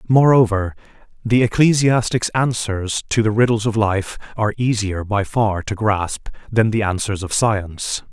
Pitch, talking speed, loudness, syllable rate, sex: 110 Hz, 150 wpm, -18 LUFS, 4.5 syllables/s, male